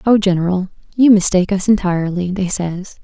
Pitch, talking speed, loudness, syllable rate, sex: 190 Hz, 160 wpm, -15 LUFS, 5.6 syllables/s, female